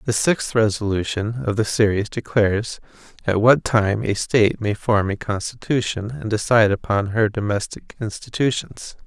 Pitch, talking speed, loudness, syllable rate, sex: 110 Hz, 145 wpm, -20 LUFS, 4.9 syllables/s, male